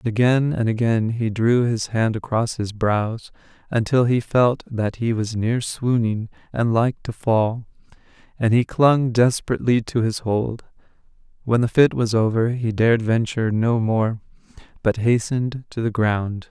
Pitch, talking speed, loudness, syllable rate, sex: 115 Hz, 160 wpm, -21 LUFS, 4.3 syllables/s, male